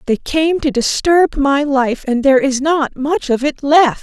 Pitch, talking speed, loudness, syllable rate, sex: 285 Hz, 195 wpm, -14 LUFS, 4.1 syllables/s, female